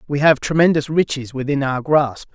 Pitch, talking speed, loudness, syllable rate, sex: 140 Hz, 180 wpm, -18 LUFS, 5.1 syllables/s, male